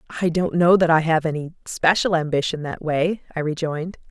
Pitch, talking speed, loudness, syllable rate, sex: 165 Hz, 190 wpm, -21 LUFS, 5.7 syllables/s, female